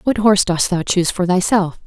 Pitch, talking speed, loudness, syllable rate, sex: 190 Hz, 225 wpm, -16 LUFS, 5.8 syllables/s, female